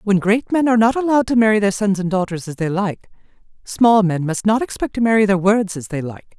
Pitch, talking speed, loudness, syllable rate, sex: 205 Hz, 255 wpm, -17 LUFS, 6.0 syllables/s, female